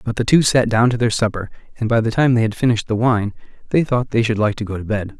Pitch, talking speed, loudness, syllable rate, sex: 115 Hz, 300 wpm, -18 LUFS, 6.6 syllables/s, male